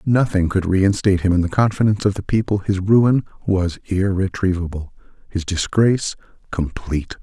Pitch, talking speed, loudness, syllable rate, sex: 95 Hz, 135 wpm, -19 LUFS, 5.3 syllables/s, male